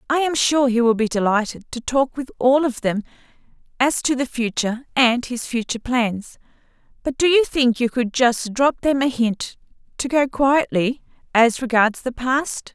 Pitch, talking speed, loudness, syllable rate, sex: 250 Hz, 185 wpm, -20 LUFS, 4.6 syllables/s, female